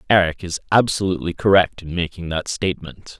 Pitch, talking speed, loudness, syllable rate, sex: 90 Hz, 150 wpm, -20 LUFS, 5.9 syllables/s, male